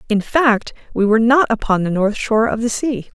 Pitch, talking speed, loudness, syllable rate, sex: 225 Hz, 225 wpm, -16 LUFS, 5.4 syllables/s, female